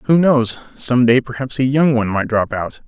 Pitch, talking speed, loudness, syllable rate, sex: 125 Hz, 230 wpm, -16 LUFS, 4.9 syllables/s, male